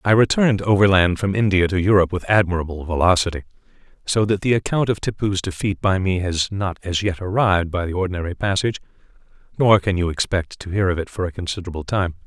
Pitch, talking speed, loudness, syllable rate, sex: 95 Hz, 195 wpm, -20 LUFS, 6.5 syllables/s, male